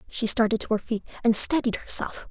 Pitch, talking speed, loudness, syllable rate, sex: 225 Hz, 210 wpm, -22 LUFS, 5.8 syllables/s, female